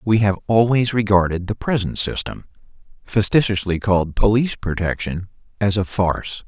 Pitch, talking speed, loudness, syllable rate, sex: 100 Hz, 110 wpm, -19 LUFS, 5.2 syllables/s, male